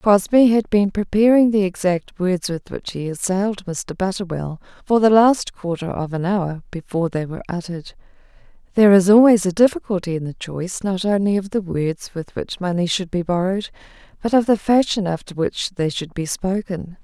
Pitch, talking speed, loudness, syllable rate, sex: 190 Hz, 185 wpm, -19 LUFS, 5.2 syllables/s, female